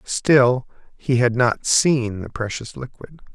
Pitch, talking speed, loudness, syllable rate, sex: 120 Hz, 145 wpm, -19 LUFS, 3.5 syllables/s, male